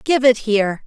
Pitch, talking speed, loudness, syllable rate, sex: 235 Hz, 210 wpm, -16 LUFS, 5.2 syllables/s, female